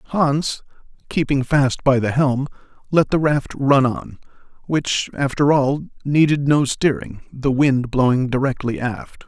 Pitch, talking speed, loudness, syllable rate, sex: 135 Hz, 140 wpm, -19 LUFS, 3.9 syllables/s, male